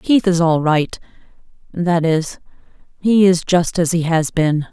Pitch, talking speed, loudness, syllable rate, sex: 170 Hz, 155 wpm, -16 LUFS, 3.9 syllables/s, female